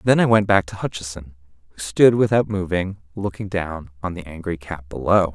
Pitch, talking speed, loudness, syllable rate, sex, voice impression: 90 Hz, 190 wpm, -21 LUFS, 5.3 syllables/s, male, masculine, very adult-like, middle-aged, thick, tensed, powerful, slightly bright, soft, very clear, very fluent, slightly raspy, very cool, very intellectual, refreshing, sincere, very calm, mature, very friendly, very reassuring, elegant, very sweet, slightly lively, very kind